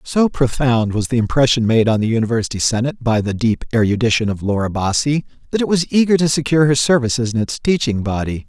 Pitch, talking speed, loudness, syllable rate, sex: 125 Hz, 205 wpm, -17 LUFS, 6.3 syllables/s, male